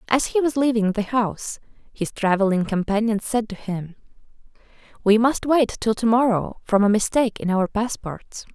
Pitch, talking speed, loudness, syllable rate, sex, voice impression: 220 Hz, 170 wpm, -21 LUFS, 5.0 syllables/s, female, very feminine, adult-like, slightly fluent, slightly cute, slightly friendly, elegant